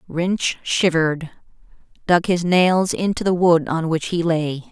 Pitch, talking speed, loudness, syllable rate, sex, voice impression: 170 Hz, 155 wpm, -19 LUFS, 4.0 syllables/s, female, feminine, adult-like, slightly middle-aged, thin, tensed, powerful, bright, slightly hard, clear, fluent, slightly cool, intellectual, refreshing, slightly sincere, calm, friendly, reassuring, slightly unique, elegant, kind, slightly modest